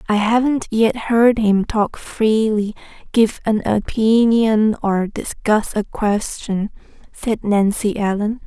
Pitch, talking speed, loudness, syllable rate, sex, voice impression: 215 Hz, 120 wpm, -18 LUFS, 3.5 syllables/s, female, feminine, adult-like, relaxed, slightly weak, soft, raspy, calm, friendly, reassuring, elegant, slightly lively, slightly modest